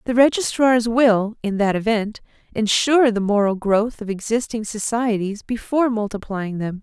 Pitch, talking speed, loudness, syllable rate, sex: 220 Hz, 140 wpm, -20 LUFS, 4.8 syllables/s, female